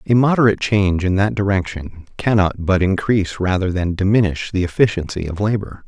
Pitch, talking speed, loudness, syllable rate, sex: 95 Hz, 165 wpm, -18 LUFS, 5.7 syllables/s, male